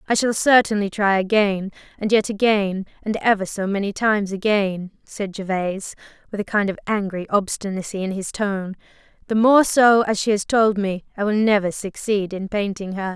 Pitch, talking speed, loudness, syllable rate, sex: 205 Hz, 185 wpm, -20 LUFS, 5.0 syllables/s, female